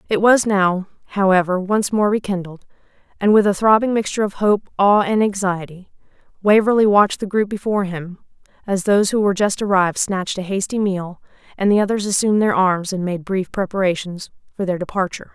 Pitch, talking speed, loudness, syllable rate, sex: 195 Hz, 180 wpm, -18 LUFS, 5.9 syllables/s, female